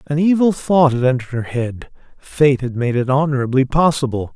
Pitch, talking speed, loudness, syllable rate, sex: 135 Hz, 180 wpm, -17 LUFS, 5.3 syllables/s, male